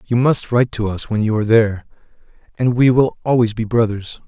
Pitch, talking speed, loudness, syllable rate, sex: 115 Hz, 210 wpm, -17 LUFS, 5.9 syllables/s, male